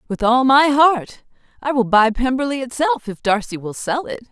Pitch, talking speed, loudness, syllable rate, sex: 250 Hz, 195 wpm, -17 LUFS, 4.8 syllables/s, female